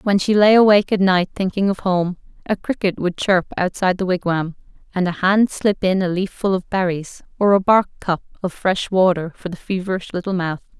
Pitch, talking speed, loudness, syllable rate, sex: 185 Hz, 210 wpm, -19 LUFS, 5.4 syllables/s, female